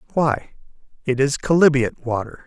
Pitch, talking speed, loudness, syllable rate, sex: 135 Hz, 120 wpm, -20 LUFS, 5.8 syllables/s, male